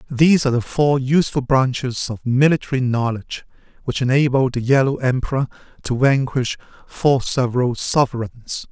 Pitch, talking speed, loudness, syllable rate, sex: 130 Hz, 130 wpm, -19 LUFS, 5.2 syllables/s, male